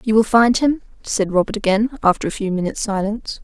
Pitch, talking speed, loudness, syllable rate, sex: 210 Hz, 210 wpm, -18 LUFS, 6.2 syllables/s, female